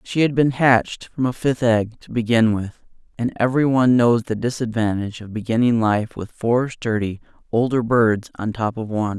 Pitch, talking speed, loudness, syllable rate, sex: 115 Hz, 190 wpm, -20 LUFS, 5.2 syllables/s, male